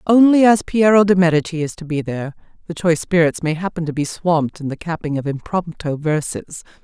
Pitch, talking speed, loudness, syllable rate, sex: 165 Hz, 200 wpm, -18 LUFS, 5.8 syllables/s, female